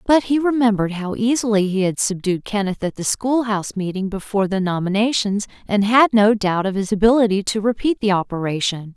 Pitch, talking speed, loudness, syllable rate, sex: 210 Hz, 190 wpm, -19 LUFS, 5.7 syllables/s, female